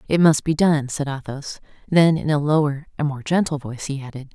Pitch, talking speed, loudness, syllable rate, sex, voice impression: 150 Hz, 220 wpm, -21 LUFS, 5.5 syllables/s, female, feminine, middle-aged, tensed, slightly hard, clear, intellectual, calm, reassuring, elegant, lively, slightly strict